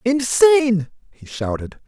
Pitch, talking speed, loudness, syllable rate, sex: 180 Hz, 95 wpm, -18 LUFS, 5.5 syllables/s, male